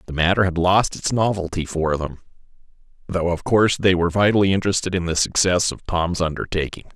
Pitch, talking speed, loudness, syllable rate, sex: 90 Hz, 180 wpm, -20 LUFS, 6.0 syllables/s, male